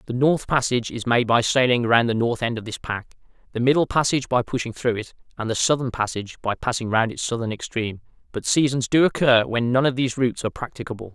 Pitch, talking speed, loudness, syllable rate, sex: 120 Hz, 225 wpm, -22 LUFS, 6.5 syllables/s, male